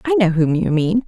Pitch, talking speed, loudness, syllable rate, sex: 195 Hz, 280 wpm, -17 LUFS, 5.2 syllables/s, female